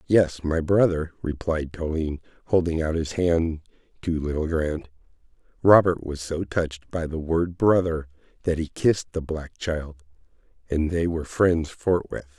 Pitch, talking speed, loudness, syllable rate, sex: 80 Hz, 150 wpm, -24 LUFS, 4.5 syllables/s, male